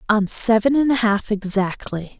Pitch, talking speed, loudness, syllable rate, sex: 215 Hz, 165 wpm, -18 LUFS, 4.5 syllables/s, female